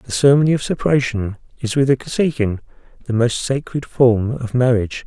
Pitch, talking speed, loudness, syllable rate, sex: 125 Hz, 165 wpm, -18 LUFS, 5.8 syllables/s, male